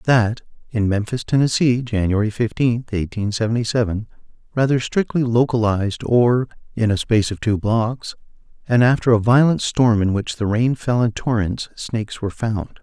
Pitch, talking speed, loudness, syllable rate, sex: 115 Hz, 160 wpm, -19 LUFS, 5.0 syllables/s, male